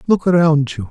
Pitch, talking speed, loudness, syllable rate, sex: 155 Hz, 200 wpm, -15 LUFS, 5.2 syllables/s, male